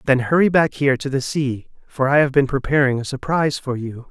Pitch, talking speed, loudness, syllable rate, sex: 135 Hz, 235 wpm, -19 LUFS, 5.8 syllables/s, male